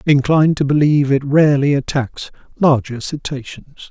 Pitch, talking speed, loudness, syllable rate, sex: 140 Hz, 125 wpm, -16 LUFS, 5.4 syllables/s, male